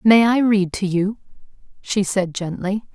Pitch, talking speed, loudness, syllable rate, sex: 200 Hz, 165 wpm, -19 LUFS, 4.1 syllables/s, female